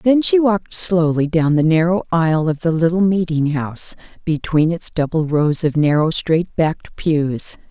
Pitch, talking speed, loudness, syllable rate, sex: 165 Hz, 170 wpm, -17 LUFS, 4.6 syllables/s, female